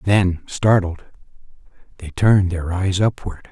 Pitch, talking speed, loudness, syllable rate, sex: 95 Hz, 120 wpm, -18 LUFS, 4.1 syllables/s, male